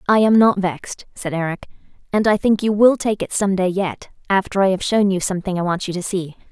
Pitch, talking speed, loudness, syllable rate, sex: 195 Hz, 240 wpm, -18 LUFS, 5.8 syllables/s, female